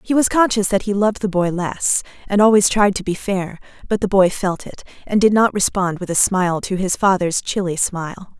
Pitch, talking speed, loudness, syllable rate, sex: 195 Hz, 230 wpm, -18 LUFS, 5.4 syllables/s, female